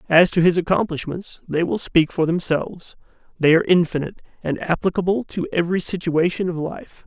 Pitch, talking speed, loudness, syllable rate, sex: 170 Hz, 160 wpm, -20 LUFS, 5.8 syllables/s, male